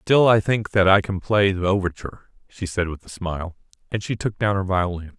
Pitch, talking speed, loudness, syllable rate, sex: 95 Hz, 230 wpm, -21 LUFS, 5.6 syllables/s, male